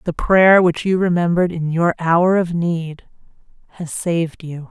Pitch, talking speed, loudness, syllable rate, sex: 170 Hz, 165 wpm, -17 LUFS, 4.4 syllables/s, female